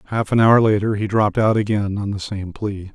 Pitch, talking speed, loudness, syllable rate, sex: 105 Hz, 245 wpm, -19 LUFS, 5.6 syllables/s, male